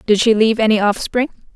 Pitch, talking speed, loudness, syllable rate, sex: 220 Hz, 195 wpm, -16 LUFS, 6.8 syllables/s, female